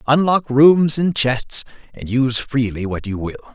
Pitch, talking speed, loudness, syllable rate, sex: 130 Hz, 170 wpm, -17 LUFS, 4.4 syllables/s, male